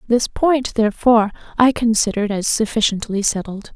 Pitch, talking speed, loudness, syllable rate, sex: 220 Hz, 130 wpm, -17 LUFS, 5.4 syllables/s, female